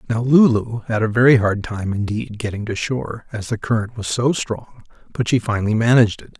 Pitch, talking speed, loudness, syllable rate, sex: 110 Hz, 205 wpm, -19 LUFS, 5.7 syllables/s, male